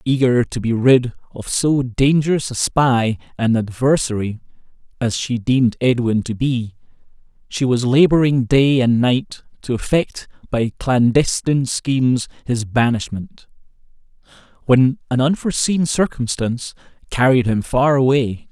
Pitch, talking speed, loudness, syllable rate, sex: 125 Hz, 125 wpm, -17 LUFS, 4.4 syllables/s, male